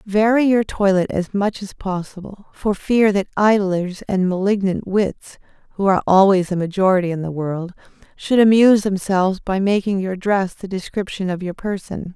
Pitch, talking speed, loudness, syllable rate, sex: 195 Hz, 170 wpm, -18 LUFS, 4.9 syllables/s, female